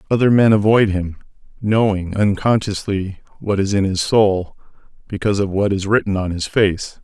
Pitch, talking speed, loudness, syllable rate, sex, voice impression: 100 Hz, 160 wpm, -17 LUFS, 4.9 syllables/s, male, masculine, adult-like